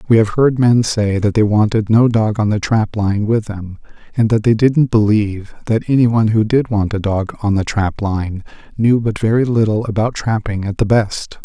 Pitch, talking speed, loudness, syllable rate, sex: 110 Hz, 220 wpm, -15 LUFS, 4.9 syllables/s, male